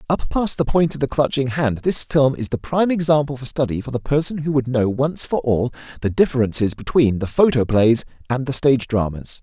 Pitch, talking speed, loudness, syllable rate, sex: 130 Hz, 215 wpm, -19 LUFS, 5.5 syllables/s, male